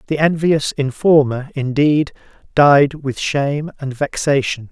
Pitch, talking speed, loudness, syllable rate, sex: 140 Hz, 115 wpm, -16 LUFS, 4.1 syllables/s, male